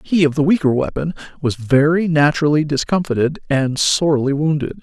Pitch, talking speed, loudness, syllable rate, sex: 150 Hz, 150 wpm, -17 LUFS, 5.5 syllables/s, male